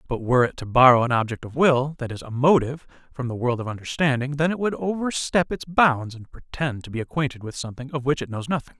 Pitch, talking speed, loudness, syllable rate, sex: 135 Hz, 245 wpm, -23 LUFS, 6.2 syllables/s, male